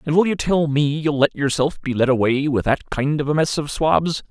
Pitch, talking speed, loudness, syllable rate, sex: 145 Hz, 265 wpm, -19 LUFS, 5.2 syllables/s, male